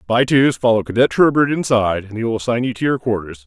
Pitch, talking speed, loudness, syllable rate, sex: 120 Hz, 225 wpm, -17 LUFS, 6.1 syllables/s, male